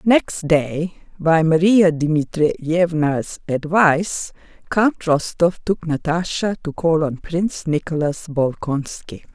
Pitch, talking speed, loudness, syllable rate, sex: 165 Hz, 105 wpm, -19 LUFS, 3.4 syllables/s, female